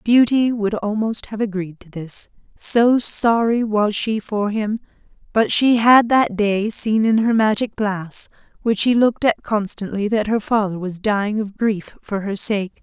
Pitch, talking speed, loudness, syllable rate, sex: 215 Hz, 180 wpm, -19 LUFS, 4.1 syllables/s, female